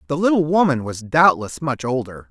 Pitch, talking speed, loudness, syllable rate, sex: 140 Hz, 210 wpm, -19 LUFS, 5.6 syllables/s, male